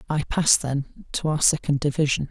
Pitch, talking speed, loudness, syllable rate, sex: 145 Hz, 180 wpm, -22 LUFS, 4.9 syllables/s, male